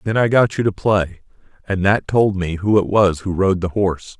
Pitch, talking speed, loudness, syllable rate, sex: 100 Hz, 245 wpm, -18 LUFS, 5.2 syllables/s, male